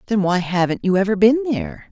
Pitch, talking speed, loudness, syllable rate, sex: 205 Hz, 220 wpm, -18 LUFS, 6.0 syllables/s, female